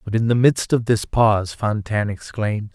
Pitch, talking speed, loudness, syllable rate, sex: 105 Hz, 195 wpm, -20 LUFS, 5.3 syllables/s, male